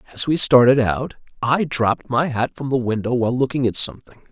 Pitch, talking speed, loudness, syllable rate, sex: 125 Hz, 210 wpm, -19 LUFS, 6.0 syllables/s, male